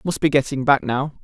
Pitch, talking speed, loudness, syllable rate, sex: 140 Hz, 245 wpm, -19 LUFS, 5.3 syllables/s, male